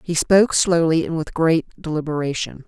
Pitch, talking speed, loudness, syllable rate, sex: 165 Hz, 155 wpm, -19 LUFS, 5.3 syllables/s, female